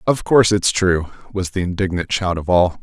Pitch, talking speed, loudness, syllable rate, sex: 95 Hz, 210 wpm, -18 LUFS, 5.3 syllables/s, male